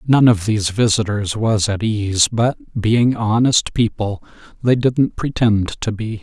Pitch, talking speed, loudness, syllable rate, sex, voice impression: 110 Hz, 155 wpm, -17 LUFS, 3.9 syllables/s, male, very masculine, slightly old, very thick, relaxed, weak, bright, soft, muffled, fluent, raspy, cool, intellectual, slightly refreshing, sincere, very calm, very mature, very friendly, very reassuring, very unique, elegant, wild, very sweet, lively, kind, strict